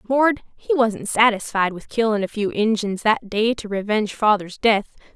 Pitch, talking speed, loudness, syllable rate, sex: 215 Hz, 175 wpm, -20 LUFS, 4.7 syllables/s, female